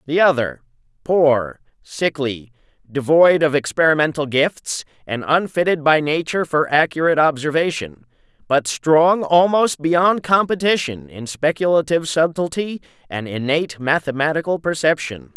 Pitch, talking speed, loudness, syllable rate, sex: 155 Hz, 105 wpm, -18 LUFS, 4.7 syllables/s, male